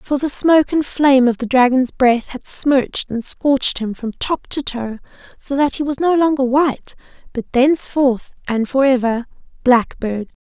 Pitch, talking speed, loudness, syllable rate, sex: 265 Hz, 170 wpm, -17 LUFS, 4.6 syllables/s, female